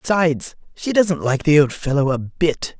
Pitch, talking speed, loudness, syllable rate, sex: 155 Hz, 195 wpm, -18 LUFS, 4.7 syllables/s, male